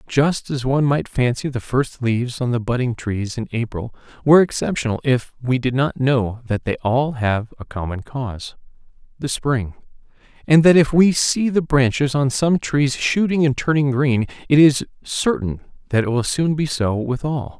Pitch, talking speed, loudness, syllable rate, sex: 130 Hz, 190 wpm, -19 LUFS, 4.7 syllables/s, male